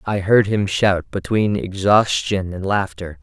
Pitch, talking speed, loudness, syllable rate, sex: 95 Hz, 150 wpm, -18 LUFS, 4.0 syllables/s, male